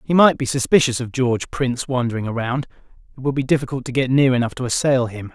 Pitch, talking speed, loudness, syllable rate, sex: 130 Hz, 225 wpm, -19 LUFS, 6.5 syllables/s, male